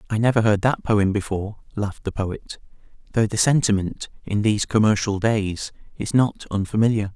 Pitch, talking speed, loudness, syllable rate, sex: 105 Hz, 160 wpm, -22 LUFS, 5.3 syllables/s, male